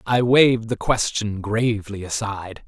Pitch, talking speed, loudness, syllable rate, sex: 110 Hz, 135 wpm, -20 LUFS, 4.7 syllables/s, male